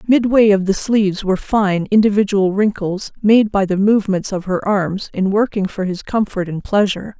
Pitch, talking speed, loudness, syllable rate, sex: 200 Hz, 185 wpm, -16 LUFS, 5.1 syllables/s, female